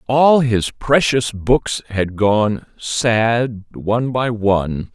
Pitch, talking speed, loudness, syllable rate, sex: 115 Hz, 120 wpm, -17 LUFS, 2.9 syllables/s, male